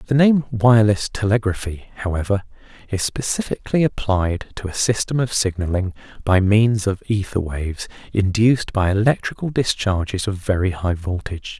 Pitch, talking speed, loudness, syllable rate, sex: 105 Hz, 135 wpm, -20 LUFS, 5.1 syllables/s, male